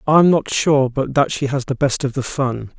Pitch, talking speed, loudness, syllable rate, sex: 135 Hz, 260 wpm, -18 LUFS, 4.6 syllables/s, male